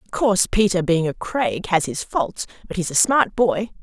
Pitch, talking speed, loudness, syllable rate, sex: 200 Hz, 220 wpm, -20 LUFS, 4.7 syllables/s, female